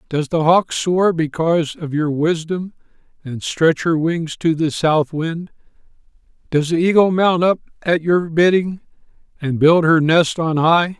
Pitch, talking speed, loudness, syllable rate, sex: 165 Hz, 165 wpm, -17 LUFS, 4.2 syllables/s, male